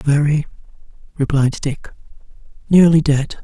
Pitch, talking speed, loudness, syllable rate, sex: 145 Hz, 85 wpm, -16 LUFS, 4.3 syllables/s, male